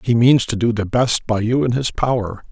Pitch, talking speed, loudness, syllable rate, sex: 115 Hz, 260 wpm, -18 LUFS, 5.0 syllables/s, male